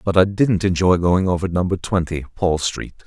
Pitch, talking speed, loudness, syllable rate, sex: 90 Hz, 195 wpm, -19 LUFS, 5.1 syllables/s, male